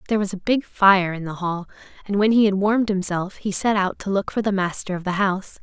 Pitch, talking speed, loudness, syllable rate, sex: 195 Hz, 265 wpm, -21 LUFS, 6.0 syllables/s, female